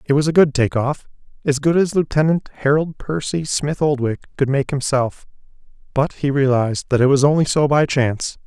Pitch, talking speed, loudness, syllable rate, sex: 140 Hz, 175 wpm, -18 LUFS, 5.4 syllables/s, male